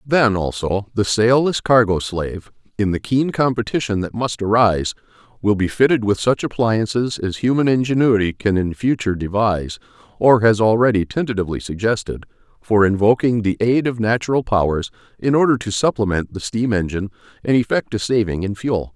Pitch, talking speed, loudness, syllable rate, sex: 110 Hz, 160 wpm, -18 LUFS, 5.5 syllables/s, male